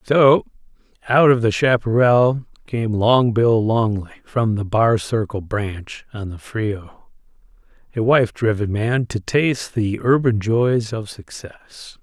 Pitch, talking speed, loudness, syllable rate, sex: 115 Hz, 130 wpm, -18 LUFS, 3.6 syllables/s, male